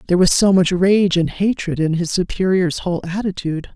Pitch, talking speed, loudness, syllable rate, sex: 180 Hz, 190 wpm, -17 LUFS, 5.7 syllables/s, female